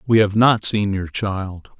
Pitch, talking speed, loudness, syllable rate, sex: 100 Hz, 200 wpm, -18 LUFS, 3.8 syllables/s, male